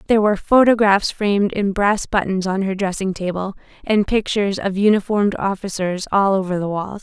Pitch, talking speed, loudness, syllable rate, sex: 200 Hz, 170 wpm, -18 LUFS, 5.5 syllables/s, female